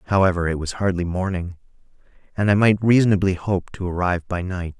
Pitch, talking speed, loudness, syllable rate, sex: 95 Hz, 175 wpm, -21 LUFS, 6.1 syllables/s, male